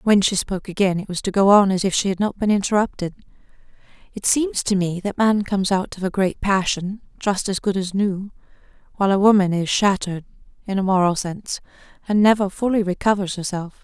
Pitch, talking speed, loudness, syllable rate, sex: 195 Hz, 195 wpm, -20 LUFS, 5.9 syllables/s, female